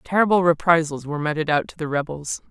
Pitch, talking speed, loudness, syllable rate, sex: 160 Hz, 190 wpm, -21 LUFS, 6.4 syllables/s, female